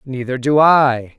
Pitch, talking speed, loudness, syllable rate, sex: 135 Hz, 150 wpm, -14 LUFS, 3.7 syllables/s, male